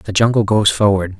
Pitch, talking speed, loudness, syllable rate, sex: 105 Hz, 200 wpm, -14 LUFS, 5.2 syllables/s, male